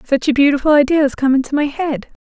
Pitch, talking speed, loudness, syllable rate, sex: 280 Hz, 235 wpm, -15 LUFS, 6.4 syllables/s, female